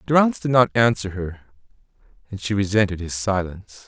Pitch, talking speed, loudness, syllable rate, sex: 105 Hz, 155 wpm, -21 LUFS, 5.8 syllables/s, male